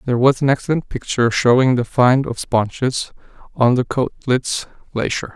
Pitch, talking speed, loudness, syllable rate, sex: 125 Hz, 155 wpm, -18 LUFS, 5.0 syllables/s, male